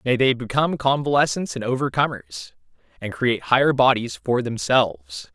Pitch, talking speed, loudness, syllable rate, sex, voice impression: 120 Hz, 135 wpm, -21 LUFS, 5.2 syllables/s, male, masculine, adult-like, tensed, bright, slightly fluent, cool, intellectual, refreshing, sincere, friendly, lively, slightly light